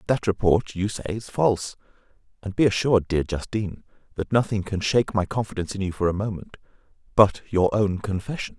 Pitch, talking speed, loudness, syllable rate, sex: 100 Hz, 180 wpm, -24 LUFS, 5.9 syllables/s, male